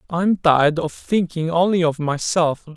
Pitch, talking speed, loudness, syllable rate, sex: 165 Hz, 150 wpm, -19 LUFS, 4.4 syllables/s, male